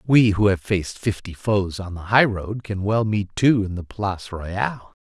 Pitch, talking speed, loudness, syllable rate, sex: 100 Hz, 215 wpm, -22 LUFS, 4.7 syllables/s, male